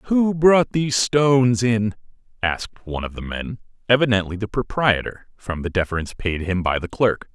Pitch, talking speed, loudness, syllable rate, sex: 110 Hz, 170 wpm, -20 LUFS, 5.1 syllables/s, male